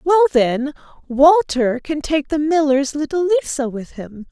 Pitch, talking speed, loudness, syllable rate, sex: 290 Hz, 155 wpm, -17 LUFS, 4.0 syllables/s, female